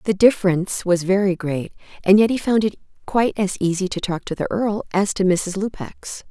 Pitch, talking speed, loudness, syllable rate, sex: 195 Hz, 210 wpm, -20 LUFS, 5.4 syllables/s, female